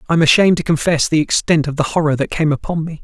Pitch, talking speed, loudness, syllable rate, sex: 155 Hz, 275 wpm, -15 LUFS, 7.0 syllables/s, male